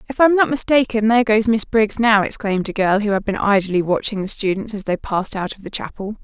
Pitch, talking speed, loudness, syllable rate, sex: 215 Hz, 250 wpm, -18 LUFS, 6.0 syllables/s, female